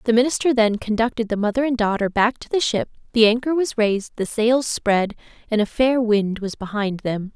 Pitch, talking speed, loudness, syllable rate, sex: 225 Hz, 210 wpm, -20 LUFS, 5.3 syllables/s, female